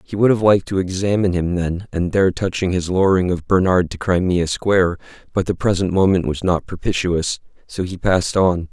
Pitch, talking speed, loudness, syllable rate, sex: 90 Hz, 200 wpm, -18 LUFS, 5.5 syllables/s, male